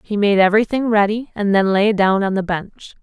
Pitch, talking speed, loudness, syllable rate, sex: 205 Hz, 220 wpm, -17 LUFS, 5.3 syllables/s, female